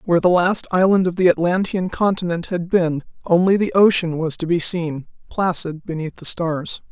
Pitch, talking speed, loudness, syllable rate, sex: 175 Hz, 180 wpm, -19 LUFS, 5.0 syllables/s, female